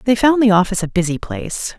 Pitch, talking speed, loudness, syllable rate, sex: 205 Hz, 235 wpm, -16 LUFS, 6.8 syllables/s, female